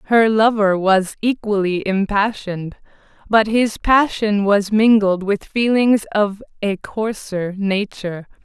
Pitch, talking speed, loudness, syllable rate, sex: 205 Hz, 115 wpm, -18 LUFS, 3.8 syllables/s, female